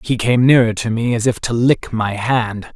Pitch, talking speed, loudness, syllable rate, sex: 115 Hz, 240 wpm, -16 LUFS, 4.7 syllables/s, male